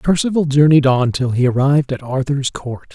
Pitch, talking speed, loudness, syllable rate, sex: 140 Hz, 185 wpm, -15 LUFS, 5.2 syllables/s, male